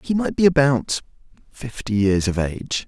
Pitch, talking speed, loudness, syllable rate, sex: 125 Hz, 165 wpm, -20 LUFS, 4.8 syllables/s, male